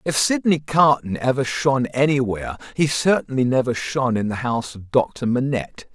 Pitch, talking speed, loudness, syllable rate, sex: 130 Hz, 160 wpm, -20 LUFS, 5.5 syllables/s, male